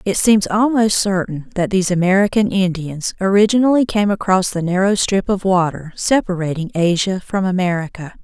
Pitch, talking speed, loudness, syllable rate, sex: 190 Hz, 145 wpm, -17 LUFS, 5.2 syllables/s, female